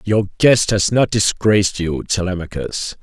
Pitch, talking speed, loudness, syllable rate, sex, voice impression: 100 Hz, 140 wpm, -17 LUFS, 4.3 syllables/s, male, masculine, adult-like, slightly fluent, cool, slightly refreshing, sincere, slightly calm